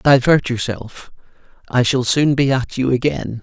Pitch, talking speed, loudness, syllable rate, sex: 130 Hz, 140 wpm, -17 LUFS, 4.3 syllables/s, male